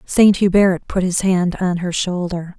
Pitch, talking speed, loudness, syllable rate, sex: 185 Hz, 185 wpm, -17 LUFS, 4.0 syllables/s, female